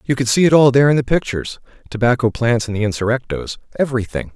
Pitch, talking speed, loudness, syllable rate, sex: 125 Hz, 180 wpm, -17 LUFS, 6.9 syllables/s, male